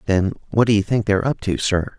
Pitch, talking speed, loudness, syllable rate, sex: 100 Hz, 270 wpm, -19 LUFS, 6.3 syllables/s, male